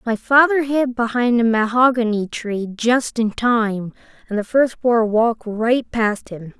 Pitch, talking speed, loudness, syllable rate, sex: 230 Hz, 165 wpm, -18 LUFS, 4.0 syllables/s, female